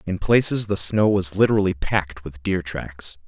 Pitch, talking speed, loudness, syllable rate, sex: 95 Hz, 185 wpm, -21 LUFS, 4.9 syllables/s, male